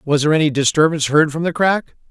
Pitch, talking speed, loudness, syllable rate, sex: 155 Hz, 230 wpm, -16 LUFS, 7.1 syllables/s, male